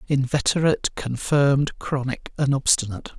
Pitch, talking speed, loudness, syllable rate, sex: 135 Hz, 95 wpm, -22 LUFS, 5.2 syllables/s, male